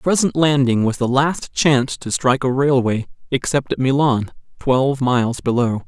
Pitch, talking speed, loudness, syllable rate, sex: 130 Hz, 175 wpm, -18 LUFS, 5.1 syllables/s, male